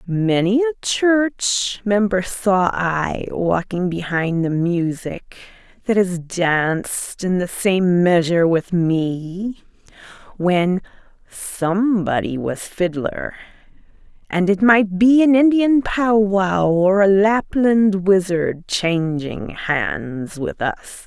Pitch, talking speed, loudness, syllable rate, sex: 190 Hz, 110 wpm, -18 LUFS, 3.2 syllables/s, female